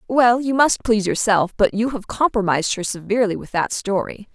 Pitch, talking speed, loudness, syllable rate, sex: 215 Hz, 195 wpm, -19 LUFS, 5.6 syllables/s, female